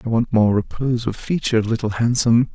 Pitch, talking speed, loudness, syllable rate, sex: 115 Hz, 190 wpm, -19 LUFS, 6.2 syllables/s, male